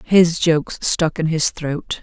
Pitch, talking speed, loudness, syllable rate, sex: 160 Hz, 180 wpm, -18 LUFS, 3.7 syllables/s, female